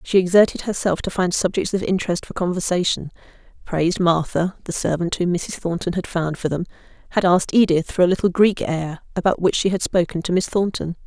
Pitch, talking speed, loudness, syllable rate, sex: 180 Hz, 200 wpm, -20 LUFS, 5.8 syllables/s, female